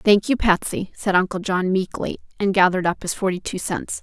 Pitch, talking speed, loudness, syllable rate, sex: 190 Hz, 210 wpm, -21 LUFS, 5.4 syllables/s, female